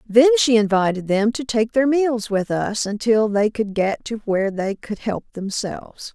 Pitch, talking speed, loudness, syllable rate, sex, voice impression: 220 Hz, 195 wpm, -20 LUFS, 4.5 syllables/s, female, feminine, adult-like, slightly intellectual, elegant, slightly sweet